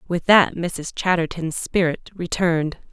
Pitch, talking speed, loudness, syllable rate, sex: 170 Hz, 125 wpm, -21 LUFS, 4.3 syllables/s, female